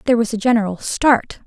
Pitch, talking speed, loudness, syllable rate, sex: 230 Hz, 205 wpm, -17 LUFS, 6.3 syllables/s, female